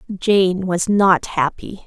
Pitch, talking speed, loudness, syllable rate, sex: 190 Hz, 130 wpm, -17 LUFS, 3.0 syllables/s, female